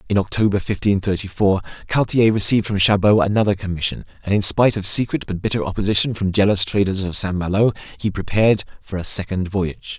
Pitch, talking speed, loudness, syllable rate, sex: 100 Hz, 185 wpm, -18 LUFS, 6.3 syllables/s, male